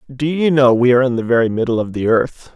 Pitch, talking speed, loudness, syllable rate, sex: 125 Hz, 280 wpm, -15 LUFS, 6.3 syllables/s, male